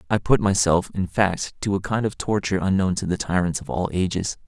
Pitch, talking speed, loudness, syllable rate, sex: 95 Hz, 230 wpm, -22 LUFS, 5.6 syllables/s, male